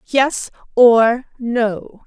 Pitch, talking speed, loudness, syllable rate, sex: 235 Hz, 85 wpm, -16 LUFS, 1.9 syllables/s, female